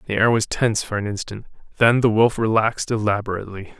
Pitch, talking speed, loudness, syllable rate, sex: 110 Hz, 190 wpm, -20 LUFS, 6.4 syllables/s, male